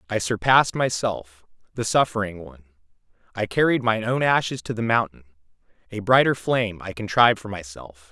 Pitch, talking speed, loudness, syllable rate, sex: 105 Hz, 155 wpm, -22 LUFS, 5.7 syllables/s, male